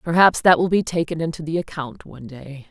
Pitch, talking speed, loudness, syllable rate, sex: 160 Hz, 220 wpm, -19 LUFS, 5.8 syllables/s, female